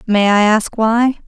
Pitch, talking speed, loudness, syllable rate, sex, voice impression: 220 Hz, 190 wpm, -14 LUFS, 3.8 syllables/s, female, very feminine, slightly young, slightly adult-like, very thin, slightly tensed, slightly weak, bright, slightly hard, clear, fluent, very cute, slightly cool, very intellectual, very refreshing, sincere, calm, friendly, reassuring, very unique, elegant, slightly wild, very sweet, lively, very kind, slightly sharp, very modest